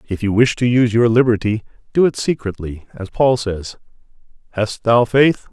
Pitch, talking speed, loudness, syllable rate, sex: 115 Hz, 175 wpm, -17 LUFS, 5.0 syllables/s, male